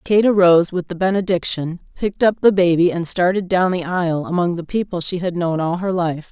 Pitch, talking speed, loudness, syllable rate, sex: 180 Hz, 220 wpm, -18 LUFS, 5.7 syllables/s, female